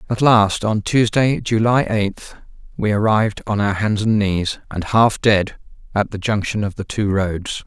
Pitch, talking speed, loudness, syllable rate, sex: 105 Hz, 180 wpm, -18 LUFS, 4.2 syllables/s, male